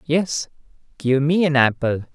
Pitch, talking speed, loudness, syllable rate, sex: 145 Hz, 140 wpm, -19 LUFS, 4.1 syllables/s, male